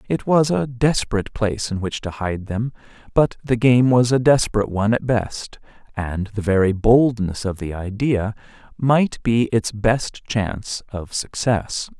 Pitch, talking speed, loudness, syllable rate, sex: 110 Hz, 165 wpm, -20 LUFS, 4.4 syllables/s, male